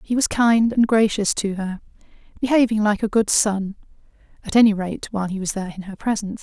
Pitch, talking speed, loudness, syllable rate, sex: 210 Hz, 205 wpm, -20 LUFS, 6.0 syllables/s, female